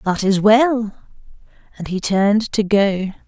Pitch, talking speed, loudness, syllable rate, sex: 205 Hz, 145 wpm, -17 LUFS, 4.2 syllables/s, female